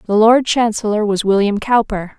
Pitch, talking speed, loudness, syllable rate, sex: 215 Hz, 165 wpm, -15 LUFS, 4.7 syllables/s, female